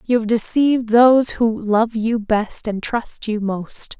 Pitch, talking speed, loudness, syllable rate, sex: 225 Hz, 180 wpm, -18 LUFS, 3.9 syllables/s, female